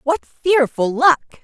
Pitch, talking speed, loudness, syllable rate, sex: 295 Hz, 125 wpm, -17 LUFS, 3.6 syllables/s, female